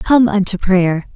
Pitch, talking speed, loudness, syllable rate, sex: 200 Hz, 155 wpm, -14 LUFS, 3.8 syllables/s, female